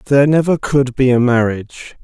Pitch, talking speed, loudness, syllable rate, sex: 130 Hz, 175 wpm, -14 LUFS, 5.6 syllables/s, male